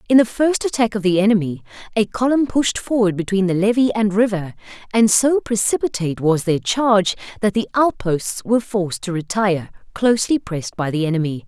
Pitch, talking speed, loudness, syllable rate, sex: 205 Hz, 180 wpm, -18 LUFS, 5.8 syllables/s, female